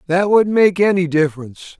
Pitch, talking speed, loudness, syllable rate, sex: 180 Hz, 165 wpm, -15 LUFS, 5.6 syllables/s, male